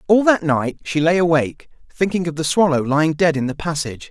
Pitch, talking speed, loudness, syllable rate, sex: 160 Hz, 220 wpm, -18 LUFS, 6.0 syllables/s, male